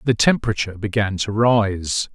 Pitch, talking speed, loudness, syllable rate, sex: 105 Hz, 140 wpm, -19 LUFS, 5.0 syllables/s, male